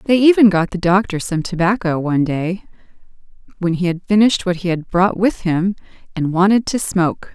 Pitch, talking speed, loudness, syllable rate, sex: 185 Hz, 190 wpm, -17 LUFS, 5.6 syllables/s, female